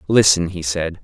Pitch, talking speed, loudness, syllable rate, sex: 90 Hz, 175 wpm, -17 LUFS, 4.6 syllables/s, male